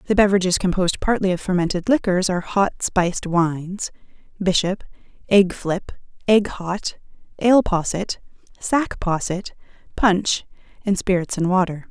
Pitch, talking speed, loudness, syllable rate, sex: 190 Hz, 125 wpm, -21 LUFS, 4.8 syllables/s, female